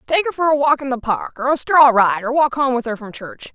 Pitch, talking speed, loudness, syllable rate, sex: 255 Hz, 320 wpm, -17 LUFS, 5.6 syllables/s, female